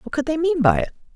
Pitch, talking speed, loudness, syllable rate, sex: 305 Hz, 315 wpm, -20 LUFS, 7.0 syllables/s, female